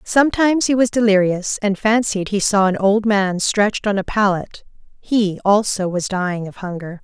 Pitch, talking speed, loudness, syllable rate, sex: 205 Hz, 180 wpm, -17 LUFS, 4.9 syllables/s, female